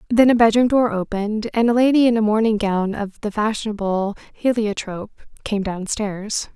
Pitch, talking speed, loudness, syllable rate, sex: 215 Hz, 165 wpm, -19 LUFS, 5.2 syllables/s, female